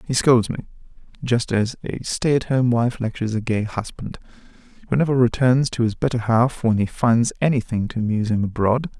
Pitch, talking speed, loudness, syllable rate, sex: 120 Hz, 200 wpm, -20 LUFS, 5.5 syllables/s, male